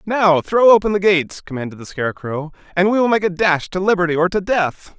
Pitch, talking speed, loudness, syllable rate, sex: 180 Hz, 230 wpm, -17 LUFS, 5.9 syllables/s, male